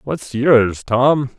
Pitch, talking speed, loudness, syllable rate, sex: 125 Hz, 130 wpm, -16 LUFS, 2.4 syllables/s, male